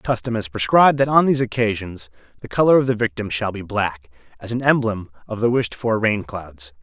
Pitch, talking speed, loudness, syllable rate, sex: 110 Hz, 210 wpm, -19 LUFS, 5.5 syllables/s, male